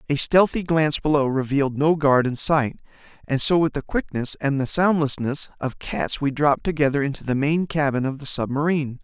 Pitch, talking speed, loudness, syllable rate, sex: 145 Hz, 195 wpm, -21 LUFS, 5.5 syllables/s, male